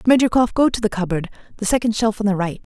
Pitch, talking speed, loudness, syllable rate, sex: 215 Hz, 240 wpm, -19 LUFS, 6.7 syllables/s, female